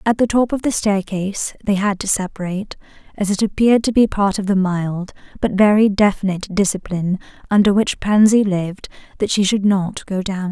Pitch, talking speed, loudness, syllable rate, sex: 200 Hz, 190 wpm, -18 LUFS, 5.5 syllables/s, female